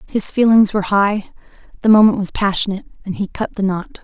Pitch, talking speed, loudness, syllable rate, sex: 200 Hz, 195 wpm, -16 LUFS, 6.0 syllables/s, female